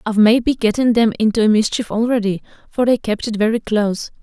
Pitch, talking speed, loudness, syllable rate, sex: 220 Hz, 185 wpm, -17 LUFS, 5.8 syllables/s, female